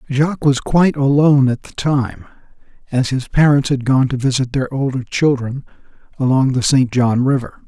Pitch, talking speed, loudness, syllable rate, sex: 135 Hz, 170 wpm, -16 LUFS, 5.2 syllables/s, male